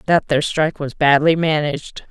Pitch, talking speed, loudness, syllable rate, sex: 150 Hz, 170 wpm, -17 LUFS, 5.6 syllables/s, female